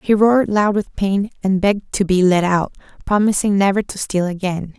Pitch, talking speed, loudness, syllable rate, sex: 195 Hz, 200 wpm, -17 LUFS, 5.2 syllables/s, female